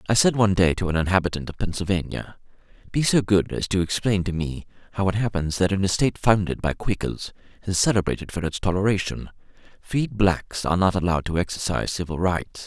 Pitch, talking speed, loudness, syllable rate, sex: 95 Hz, 195 wpm, -23 LUFS, 6.1 syllables/s, male